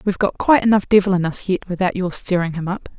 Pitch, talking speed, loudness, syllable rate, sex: 190 Hz, 260 wpm, -18 LUFS, 7.0 syllables/s, female